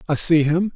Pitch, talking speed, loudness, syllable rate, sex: 165 Hz, 240 wpm, -17 LUFS, 5.3 syllables/s, male